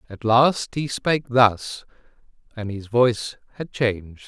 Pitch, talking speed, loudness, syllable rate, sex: 115 Hz, 125 wpm, -21 LUFS, 4.1 syllables/s, male